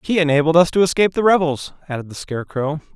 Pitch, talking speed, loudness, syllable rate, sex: 160 Hz, 205 wpm, -18 LUFS, 7.0 syllables/s, male